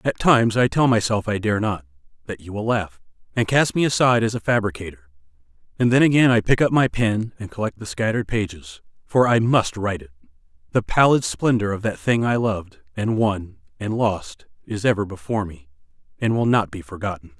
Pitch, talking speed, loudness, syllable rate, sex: 110 Hz, 195 wpm, -21 LUFS, 5.7 syllables/s, male